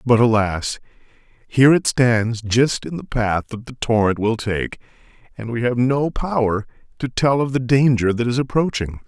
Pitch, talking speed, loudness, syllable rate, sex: 120 Hz, 180 wpm, -19 LUFS, 4.6 syllables/s, male